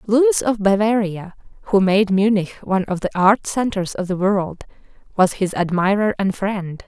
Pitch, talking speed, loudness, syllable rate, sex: 200 Hz, 165 wpm, -19 LUFS, 4.5 syllables/s, female